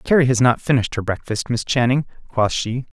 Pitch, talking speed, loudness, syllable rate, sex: 125 Hz, 200 wpm, -19 LUFS, 5.7 syllables/s, male